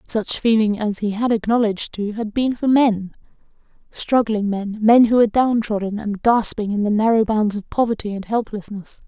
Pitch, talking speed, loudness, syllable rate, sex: 215 Hz, 180 wpm, -19 LUFS, 5.1 syllables/s, female